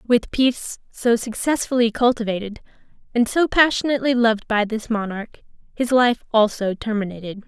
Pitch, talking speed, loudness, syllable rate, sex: 230 Hz, 130 wpm, -20 LUFS, 5.3 syllables/s, female